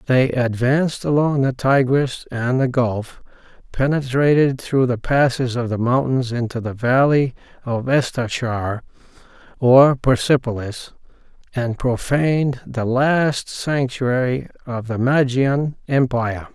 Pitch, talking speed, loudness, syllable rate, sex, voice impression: 130 Hz, 110 wpm, -19 LUFS, 3.9 syllables/s, male, very masculine, slightly old, thick, tensed, weak, bright, soft, muffled, very fluent, slightly raspy, cool, intellectual, slightly refreshing, sincere, calm, mature, friendly, very reassuring, very unique, elegant, very wild, sweet, lively, kind, slightly modest